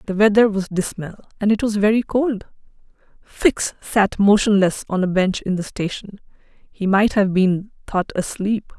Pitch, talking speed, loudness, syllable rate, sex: 200 Hz, 165 wpm, -19 LUFS, 4.4 syllables/s, female